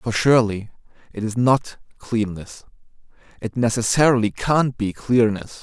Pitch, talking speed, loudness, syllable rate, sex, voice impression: 115 Hz, 105 wpm, -20 LUFS, 4.5 syllables/s, male, masculine, adult-like, slightly soft, cool, sincere, calm